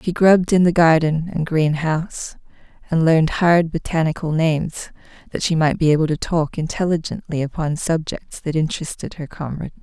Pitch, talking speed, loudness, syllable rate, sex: 160 Hz, 165 wpm, -19 LUFS, 5.4 syllables/s, female